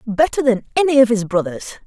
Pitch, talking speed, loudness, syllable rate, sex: 235 Hz, 195 wpm, -17 LUFS, 6.2 syllables/s, female